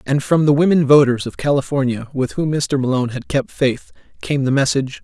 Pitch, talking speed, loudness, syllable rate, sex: 140 Hz, 205 wpm, -17 LUFS, 5.7 syllables/s, male